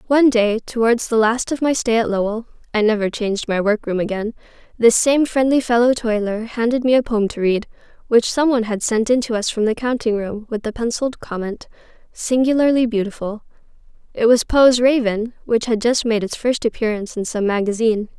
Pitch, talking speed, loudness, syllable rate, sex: 230 Hz, 200 wpm, -18 LUFS, 5.2 syllables/s, female